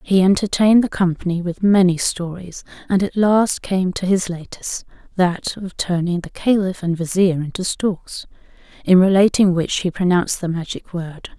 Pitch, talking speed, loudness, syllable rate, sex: 185 Hz, 155 wpm, -18 LUFS, 4.8 syllables/s, female